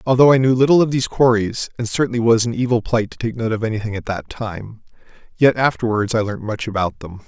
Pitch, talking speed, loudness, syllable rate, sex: 115 Hz, 230 wpm, -18 LUFS, 6.1 syllables/s, male